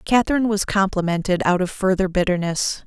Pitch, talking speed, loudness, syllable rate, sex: 190 Hz, 145 wpm, -20 LUFS, 5.9 syllables/s, female